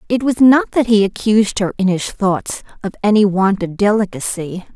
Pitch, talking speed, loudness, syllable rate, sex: 200 Hz, 190 wpm, -15 LUFS, 5.0 syllables/s, female